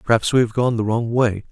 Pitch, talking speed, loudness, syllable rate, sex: 115 Hz, 275 wpm, -19 LUFS, 5.8 syllables/s, male